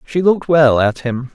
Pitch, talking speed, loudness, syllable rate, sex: 140 Hz, 225 wpm, -14 LUFS, 4.9 syllables/s, male